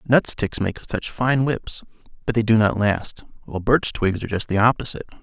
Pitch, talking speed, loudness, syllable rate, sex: 110 Hz, 205 wpm, -21 LUFS, 5.5 syllables/s, male